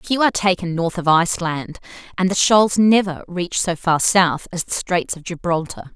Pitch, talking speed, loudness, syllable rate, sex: 180 Hz, 190 wpm, -18 LUFS, 4.8 syllables/s, female